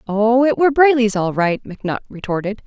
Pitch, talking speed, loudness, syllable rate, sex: 225 Hz, 180 wpm, -17 LUFS, 6.0 syllables/s, female